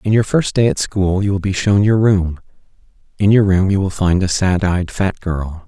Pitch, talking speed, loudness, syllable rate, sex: 95 Hz, 245 wpm, -16 LUFS, 4.8 syllables/s, male